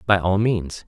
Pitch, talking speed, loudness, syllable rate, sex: 95 Hz, 205 wpm, -20 LUFS, 4.1 syllables/s, male